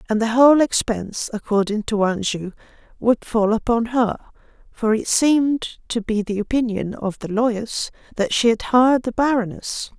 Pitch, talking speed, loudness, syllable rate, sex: 225 Hz, 170 wpm, -20 LUFS, 4.9 syllables/s, female